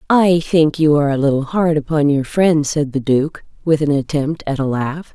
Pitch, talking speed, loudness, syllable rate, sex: 150 Hz, 220 wpm, -16 LUFS, 4.9 syllables/s, female